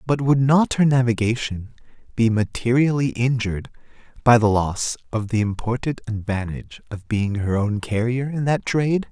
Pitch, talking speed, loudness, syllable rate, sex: 120 Hz, 150 wpm, -21 LUFS, 4.9 syllables/s, male